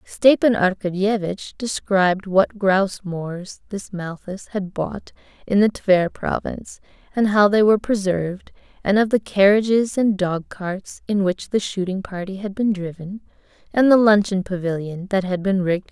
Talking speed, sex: 170 wpm, female